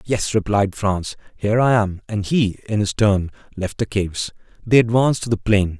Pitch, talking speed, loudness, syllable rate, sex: 105 Hz, 195 wpm, -20 LUFS, 5.0 syllables/s, male